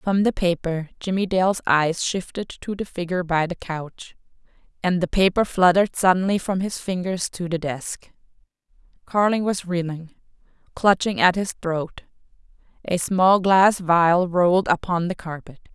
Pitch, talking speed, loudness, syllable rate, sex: 180 Hz, 140 wpm, -21 LUFS, 4.6 syllables/s, female